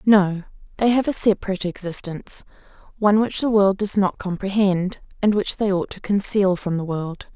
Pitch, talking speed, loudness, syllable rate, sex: 195 Hz, 180 wpm, -21 LUFS, 5.3 syllables/s, female